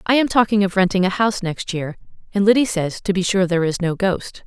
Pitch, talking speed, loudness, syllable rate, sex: 190 Hz, 255 wpm, -19 LUFS, 6.1 syllables/s, female